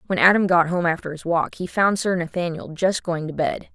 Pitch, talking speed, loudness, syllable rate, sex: 175 Hz, 240 wpm, -21 LUFS, 5.3 syllables/s, female